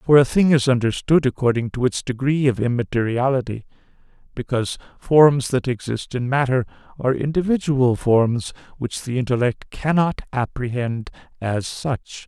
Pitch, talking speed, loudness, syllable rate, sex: 130 Hz, 130 wpm, -20 LUFS, 4.9 syllables/s, male